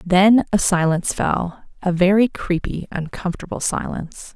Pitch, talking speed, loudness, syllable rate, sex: 185 Hz, 125 wpm, -20 LUFS, 4.8 syllables/s, female